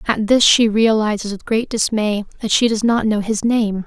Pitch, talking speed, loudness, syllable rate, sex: 220 Hz, 220 wpm, -16 LUFS, 4.8 syllables/s, female